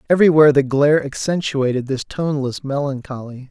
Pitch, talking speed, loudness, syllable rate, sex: 140 Hz, 120 wpm, -17 LUFS, 6.0 syllables/s, male